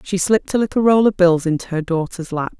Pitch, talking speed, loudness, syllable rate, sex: 185 Hz, 255 wpm, -17 LUFS, 6.0 syllables/s, female